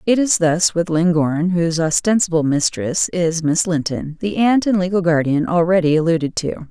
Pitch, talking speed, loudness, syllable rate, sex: 170 Hz, 170 wpm, -17 LUFS, 5.0 syllables/s, female